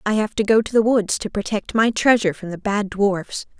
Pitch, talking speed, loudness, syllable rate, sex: 210 Hz, 250 wpm, -19 LUFS, 5.3 syllables/s, female